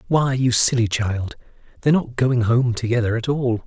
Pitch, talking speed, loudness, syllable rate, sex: 120 Hz, 180 wpm, -20 LUFS, 5.0 syllables/s, male